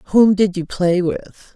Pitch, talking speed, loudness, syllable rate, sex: 190 Hz, 195 wpm, -17 LUFS, 4.3 syllables/s, female